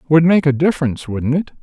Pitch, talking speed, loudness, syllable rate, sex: 150 Hz, 220 wpm, -16 LUFS, 6.7 syllables/s, male